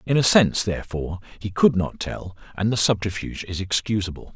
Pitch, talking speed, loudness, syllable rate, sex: 100 Hz, 180 wpm, -23 LUFS, 5.9 syllables/s, male